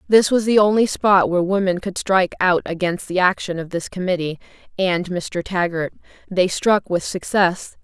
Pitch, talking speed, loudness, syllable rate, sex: 185 Hz, 175 wpm, -19 LUFS, 4.9 syllables/s, female